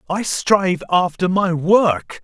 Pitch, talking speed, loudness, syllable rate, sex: 180 Hz, 135 wpm, -17 LUFS, 3.6 syllables/s, male